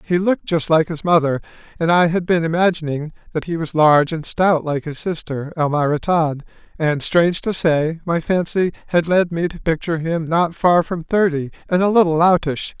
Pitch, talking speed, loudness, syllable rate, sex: 165 Hz, 195 wpm, -18 LUFS, 5.2 syllables/s, male